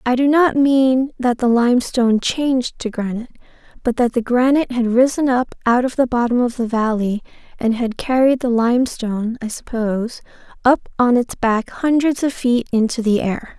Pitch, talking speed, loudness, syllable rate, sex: 245 Hz, 180 wpm, -18 LUFS, 5.0 syllables/s, female